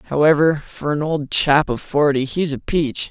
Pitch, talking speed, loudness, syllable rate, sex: 150 Hz, 195 wpm, -18 LUFS, 4.2 syllables/s, male